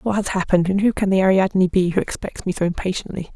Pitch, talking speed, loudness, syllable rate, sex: 190 Hz, 250 wpm, -20 LUFS, 6.7 syllables/s, female